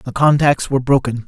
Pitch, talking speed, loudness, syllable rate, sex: 130 Hz, 190 wpm, -15 LUFS, 5.7 syllables/s, male